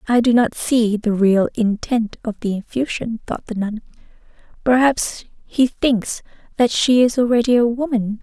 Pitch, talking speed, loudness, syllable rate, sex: 230 Hz, 160 wpm, -18 LUFS, 4.4 syllables/s, female